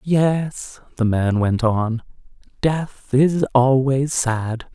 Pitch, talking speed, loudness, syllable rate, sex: 130 Hz, 115 wpm, -19 LUFS, 2.7 syllables/s, male